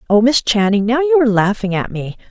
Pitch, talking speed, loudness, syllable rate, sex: 220 Hz, 235 wpm, -15 LUFS, 5.9 syllables/s, female